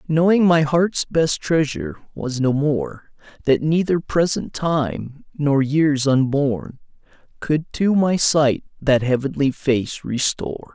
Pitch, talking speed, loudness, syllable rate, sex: 145 Hz, 130 wpm, -19 LUFS, 3.5 syllables/s, male